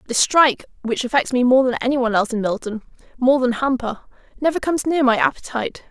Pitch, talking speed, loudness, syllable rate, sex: 260 Hz, 185 wpm, -19 LUFS, 6.9 syllables/s, female